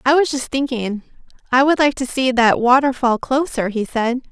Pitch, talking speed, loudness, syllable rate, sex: 255 Hz, 195 wpm, -17 LUFS, 4.9 syllables/s, female